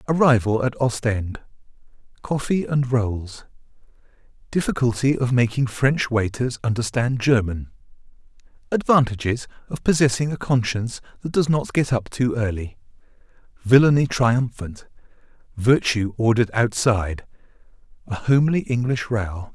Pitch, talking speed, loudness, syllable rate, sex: 120 Hz, 85 wpm, -21 LUFS, 4.8 syllables/s, male